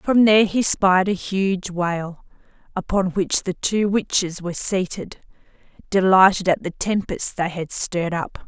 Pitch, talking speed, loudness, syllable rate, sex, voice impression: 185 Hz, 155 wpm, -20 LUFS, 4.4 syllables/s, female, very feminine, slightly adult-like, thin, tensed, powerful, slightly dark, slightly hard, clear, fluent, cool, intellectual, refreshing, slightly sincere, calm, slightly friendly, reassuring, unique, elegant, slightly wild, sweet, lively, slightly strict, slightly sharp, slightly light